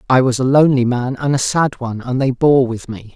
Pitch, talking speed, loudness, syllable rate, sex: 130 Hz, 265 wpm, -16 LUFS, 5.7 syllables/s, male